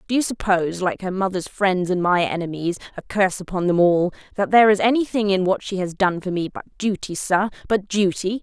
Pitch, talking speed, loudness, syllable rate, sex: 190 Hz, 205 wpm, -21 LUFS, 5.7 syllables/s, female